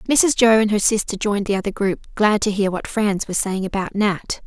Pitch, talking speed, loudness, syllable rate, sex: 205 Hz, 240 wpm, -19 LUFS, 5.1 syllables/s, female